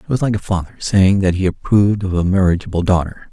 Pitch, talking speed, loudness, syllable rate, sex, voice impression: 95 Hz, 235 wpm, -16 LUFS, 6.2 syllables/s, male, very masculine, very adult-like, old, very thick, very relaxed, very dark, very soft, very muffled, slightly halting, raspy, very cool, intellectual, very sincere, very calm, very mature, very friendly, very reassuring, elegant, slightly wild, sweet, very kind, very modest